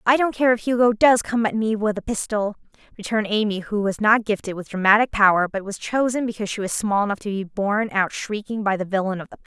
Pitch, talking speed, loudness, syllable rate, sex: 210 Hz, 255 wpm, -21 LUFS, 6.5 syllables/s, female